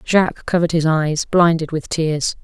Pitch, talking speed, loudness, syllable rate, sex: 160 Hz, 175 wpm, -18 LUFS, 4.8 syllables/s, female